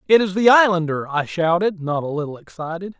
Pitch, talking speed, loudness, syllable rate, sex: 175 Hz, 200 wpm, -19 LUFS, 5.8 syllables/s, male